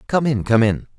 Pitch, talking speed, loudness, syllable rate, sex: 120 Hz, 245 wpm, -18 LUFS, 5.3 syllables/s, male